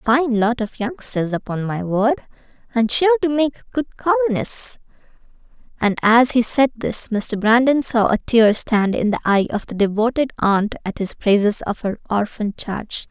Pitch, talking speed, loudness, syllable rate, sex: 230 Hz, 180 wpm, -19 LUFS, 4.6 syllables/s, female